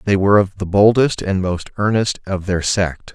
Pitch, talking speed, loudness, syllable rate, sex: 95 Hz, 210 wpm, -17 LUFS, 4.9 syllables/s, male